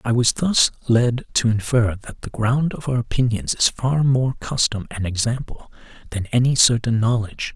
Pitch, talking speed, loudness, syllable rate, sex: 115 Hz, 175 wpm, -20 LUFS, 4.8 syllables/s, male